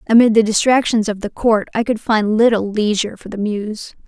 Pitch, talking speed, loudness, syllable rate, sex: 215 Hz, 205 wpm, -16 LUFS, 5.4 syllables/s, female